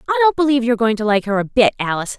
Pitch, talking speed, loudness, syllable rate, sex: 240 Hz, 330 wpm, -17 LUFS, 8.1 syllables/s, female